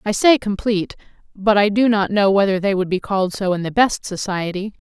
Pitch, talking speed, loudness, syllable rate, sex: 200 Hz, 220 wpm, -18 LUFS, 5.6 syllables/s, female